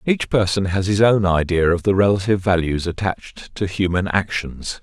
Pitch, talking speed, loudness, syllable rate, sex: 95 Hz, 175 wpm, -19 LUFS, 5.1 syllables/s, male